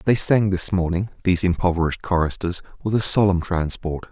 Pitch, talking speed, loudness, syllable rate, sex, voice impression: 90 Hz, 160 wpm, -21 LUFS, 5.5 syllables/s, male, masculine, adult-like, weak, slightly dark, fluent, slightly cool, intellectual, sincere, calm, slightly friendly, slightly wild, kind, modest